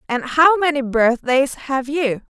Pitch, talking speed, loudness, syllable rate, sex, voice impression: 275 Hz, 150 wpm, -17 LUFS, 3.9 syllables/s, female, feminine, adult-like, slightly bright, clear, refreshing, friendly, slightly intense